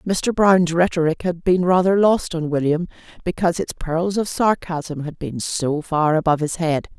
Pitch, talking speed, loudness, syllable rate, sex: 170 Hz, 180 wpm, -20 LUFS, 4.7 syllables/s, female